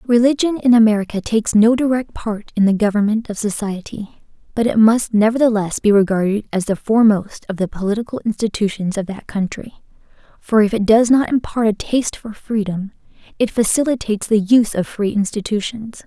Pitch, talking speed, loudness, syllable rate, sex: 215 Hz, 170 wpm, -17 LUFS, 5.7 syllables/s, female